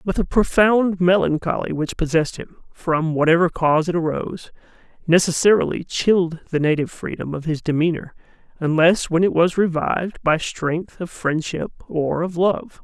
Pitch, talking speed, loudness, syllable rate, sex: 170 Hz, 150 wpm, -20 LUFS, 5.0 syllables/s, male